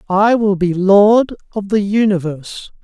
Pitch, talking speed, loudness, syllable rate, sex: 200 Hz, 150 wpm, -14 LUFS, 4.1 syllables/s, male